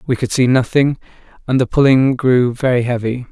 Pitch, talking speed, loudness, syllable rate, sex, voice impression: 125 Hz, 180 wpm, -15 LUFS, 5.2 syllables/s, male, masculine, adult-like, slightly relaxed, slightly weak, clear, calm, slightly friendly, reassuring, wild, kind, modest